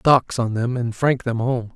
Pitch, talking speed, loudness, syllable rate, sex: 120 Hz, 240 wpm, -21 LUFS, 4.1 syllables/s, male